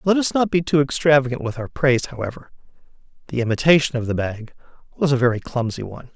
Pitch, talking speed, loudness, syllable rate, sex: 135 Hz, 195 wpm, -20 LUFS, 6.6 syllables/s, male